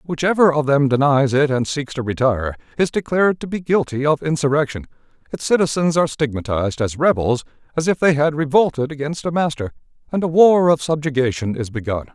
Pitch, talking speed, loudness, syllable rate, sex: 145 Hz, 185 wpm, -18 LUFS, 5.9 syllables/s, male